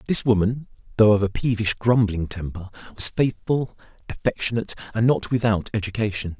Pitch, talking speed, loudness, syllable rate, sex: 110 Hz, 140 wpm, -22 LUFS, 5.5 syllables/s, male